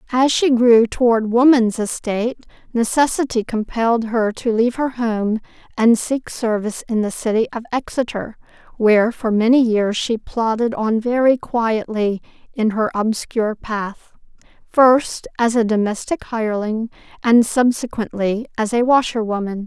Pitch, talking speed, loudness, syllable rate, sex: 230 Hz, 135 wpm, -18 LUFS, 4.5 syllables/s, female